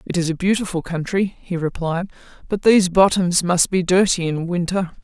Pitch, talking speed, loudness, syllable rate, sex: 180 Hz, 180 wpm, -19 LUFS, 5.2 syllables/s, female